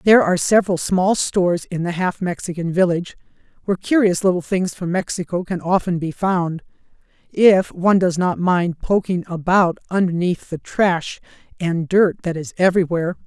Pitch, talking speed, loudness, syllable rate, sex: 180 Hz, 160 wpm, -19 LUFS, 5.3 syllables/s, female